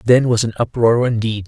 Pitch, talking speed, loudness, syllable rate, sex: 115 Hz, 205 wpm, -16 LUFS, 5.2 syllables/s, male